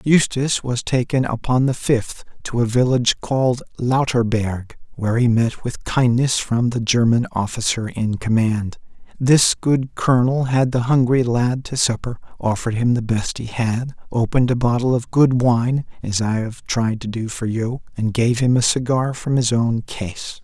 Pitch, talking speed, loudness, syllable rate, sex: 120 Hz, 175 wpm, -19 LUFS, 4.6 syllables/s, male